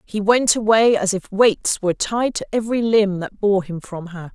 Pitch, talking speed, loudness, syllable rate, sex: 205 Hz, 220 wpm, -18 LUFS, 4.8 syllables/s, female